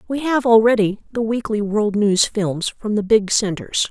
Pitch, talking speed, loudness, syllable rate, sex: 215 Hz, 185 wpm, -18 LUFS, 4.4 syllables/s, female